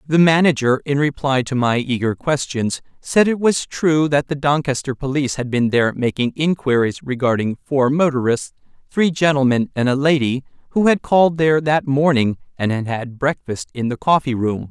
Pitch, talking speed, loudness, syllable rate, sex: 140 Hz, 165 wpm, -18 LUFS, 5.1 syllables/s, male